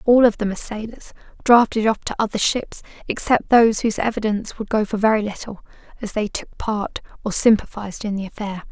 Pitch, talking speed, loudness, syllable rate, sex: 215 Hz, 195 wpm, -20 LUFS, 5.9 syllables/s, female